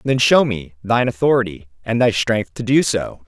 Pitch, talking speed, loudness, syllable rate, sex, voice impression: 110 Hz, 200 wpm, -18 LUFS, 5.1 syllables/s, male, masculine, adult-like, slightly clear, slightly cool, refreshing, sincere, slightly elegant